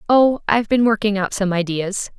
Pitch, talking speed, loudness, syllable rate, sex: 210 Hz, 165 wpm, -18 LUFS, 5.4 syllables/s, female